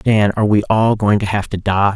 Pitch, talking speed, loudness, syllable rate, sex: 105 Hz, 275 wpm, -15 LUFS, 5.4 syllables/s, male